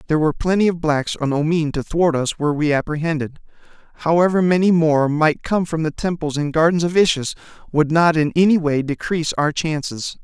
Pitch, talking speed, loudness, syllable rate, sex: 160 Hz, 195 wpm, -18 LUFS, 5.7 syllables/s, male